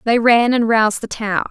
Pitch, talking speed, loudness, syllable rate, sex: 225 Hz, 240 wpm, -15 LUFS, 5.1 syllables/s, female